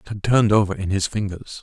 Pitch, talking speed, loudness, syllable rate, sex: 100 Hz, 260 wpm, -20 LUFS, 6.5 syllables/s, male